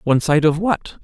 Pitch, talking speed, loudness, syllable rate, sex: 165 Hz, 230 wpm, -17 LUFS, 5.5 syllables/s, male